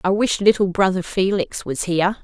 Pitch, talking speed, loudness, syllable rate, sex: 190 Hz, 190 wpm, -19 LUFS, 5.2 syllables/s, female